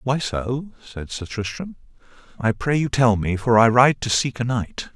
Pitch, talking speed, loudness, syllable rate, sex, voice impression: 120 Hz, 205 wpm, -21 LUFS, 4.5 syllables/s, male, masculine, middle-aged, slightly relaxed, weak, slightly dark, soft, slightly halting, raspy, cool, intellectual, calm, slightly mature, reassuring, wild, modest